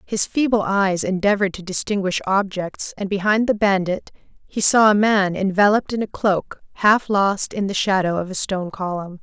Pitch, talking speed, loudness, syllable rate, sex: 195 Hz, 180 wpm, -19 LUFS, 5.1 syllables/s, female